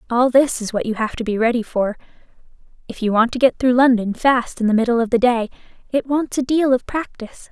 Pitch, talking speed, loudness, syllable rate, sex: 240 Hz, 240 wpm, -18 LUFS, 5.9 syllables/s, female